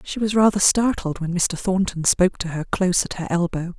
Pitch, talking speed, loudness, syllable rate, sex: 185 Hz, 220 wpm, -20 LUFS, 5.5 syllables/s, female